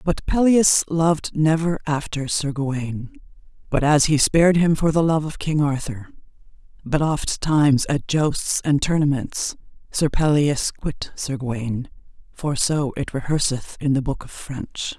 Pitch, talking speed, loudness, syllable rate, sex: 150 Hz, 150 wpm, -21 LUFS, 4.4 syllables/s, female